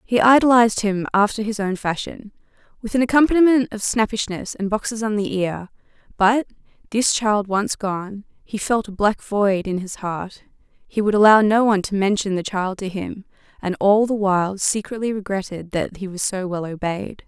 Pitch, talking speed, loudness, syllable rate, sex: 205 Hz, 185 wpm, -20 LUFS, 5.0 syllables/s, female